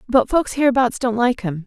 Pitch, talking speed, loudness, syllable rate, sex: 240 Hz, 215 wpm, -18 LUFS, 5.3 syllables/s, female